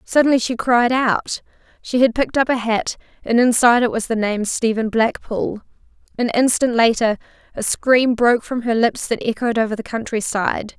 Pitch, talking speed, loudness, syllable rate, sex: 235 Hz, 180 wpm, -18 LUFS, 5.1 syllables/s, female